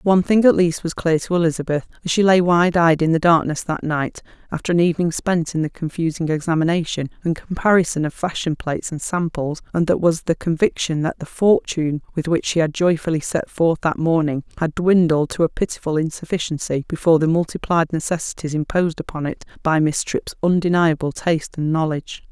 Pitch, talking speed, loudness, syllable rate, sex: 165 Hz, 190 wpm, -19 LUFS, 5.8 syllables/s, female